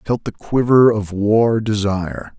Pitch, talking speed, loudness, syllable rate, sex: 110 Hz, 175 wpm, -16 LUFS, 4.4 syllables/s, male